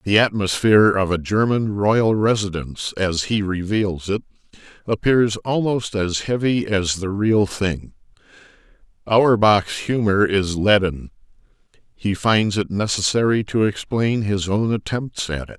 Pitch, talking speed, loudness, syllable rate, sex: 100 Hz, 130 wpm, -19 LUFS, 4.2 syllables/s, male